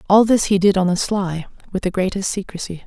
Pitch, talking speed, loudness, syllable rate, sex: 190 Hz, 230 wpm, -19 LUFS, 5.8 syllables/s, female